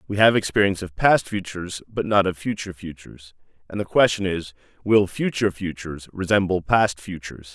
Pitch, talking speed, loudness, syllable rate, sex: 95 Hz, 165 wpm, -22 LUFS, 5.8 syllables/s, male